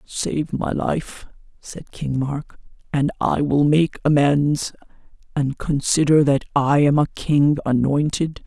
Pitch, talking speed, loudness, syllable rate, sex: 145 Hz, 135 wpm, -20 LUFS, 3.6 syllables/s, female